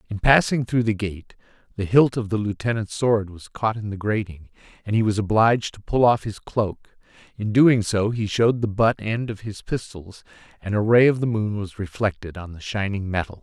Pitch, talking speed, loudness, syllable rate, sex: 105 Hz, 215 wpm, -22 LUFS, 5.1 syllables/s, male